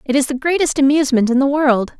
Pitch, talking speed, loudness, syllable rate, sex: 275 Hz, 240 wpm, -15 LUFS, 6.5 syllables/s, female